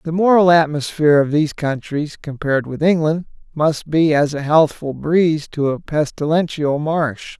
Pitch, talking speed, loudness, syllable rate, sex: 155 Hz, 155 wpm, -17 LUFS, 4.8 syllables/s, male